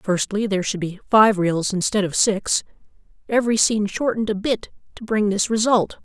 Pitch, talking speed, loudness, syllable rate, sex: 205 Hz, 180 wpm, -20 LUFS, 5.5 syllables/s, female